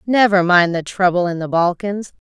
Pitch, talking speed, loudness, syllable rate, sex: 185 Hz, 180 wpm, -16 LUFS, 4.9 syllables/s, female